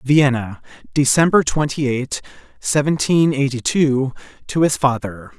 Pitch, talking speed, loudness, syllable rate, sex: 140 Hz, 110 wpm, -18 LUFS, 4.2 syllables/s, male